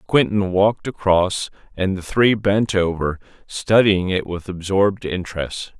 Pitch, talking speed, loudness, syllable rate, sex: 95 Hz, 135 wpm, -19 LUFS, 4.3 syllables/s, male